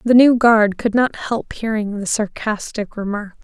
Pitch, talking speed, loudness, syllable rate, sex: 220 Hz, 175 wpm, -18 LUFS, 4.3 syllables/s, female